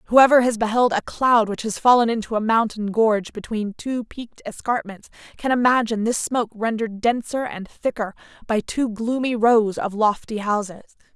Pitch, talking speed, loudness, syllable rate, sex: 225 Hz, 165 wpm, -21 LUFS, 5.2 syllables/s, female